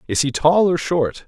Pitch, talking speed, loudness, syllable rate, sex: 155 Hz, 235 wpm, -18 LUFS, 4.6 syllables/s, male